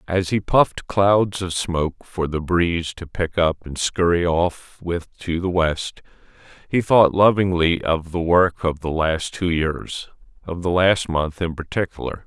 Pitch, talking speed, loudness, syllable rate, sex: 85 Hz, 175 wpm, -20 LUFS, 4.1 syllables/s, male